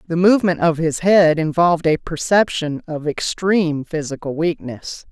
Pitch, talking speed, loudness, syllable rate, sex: 165 Hz, 140 wpm, -18 LUFS, 4.8 syllables/s, female